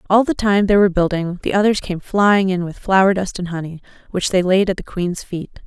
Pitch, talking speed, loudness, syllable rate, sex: 190 Hz, 245 wpm, -17 LUFS, 5.5 syllables/s, female